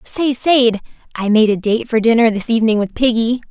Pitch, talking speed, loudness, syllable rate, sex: 230 Hz, 205 wpm, -15 LUFS, 5.3 syllables/s, female